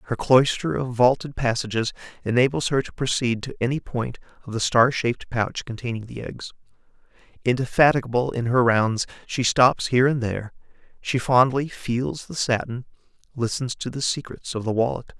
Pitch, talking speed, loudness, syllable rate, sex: 125 Hz, 160 wpm, -23 LUFS, 5.3 syllables/s, male